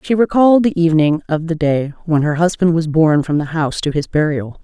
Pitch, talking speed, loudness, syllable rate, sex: 160 Hz, 235 wpm, -15 LUFS, 6.0 syllables/s, female